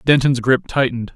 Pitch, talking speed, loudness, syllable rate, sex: 130 Hz, 155 wpm, -17 LUFS, 5.7 syllables/s, male